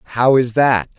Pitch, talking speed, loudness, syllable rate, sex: 125 Hz, 185 wpm, -15 LUFS, 4.8 syllables/s, male